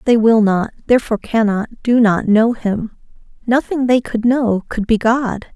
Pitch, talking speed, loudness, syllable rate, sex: 225 Hz, 175 wpm, -16 LUFS, 4.7 syllables/s, female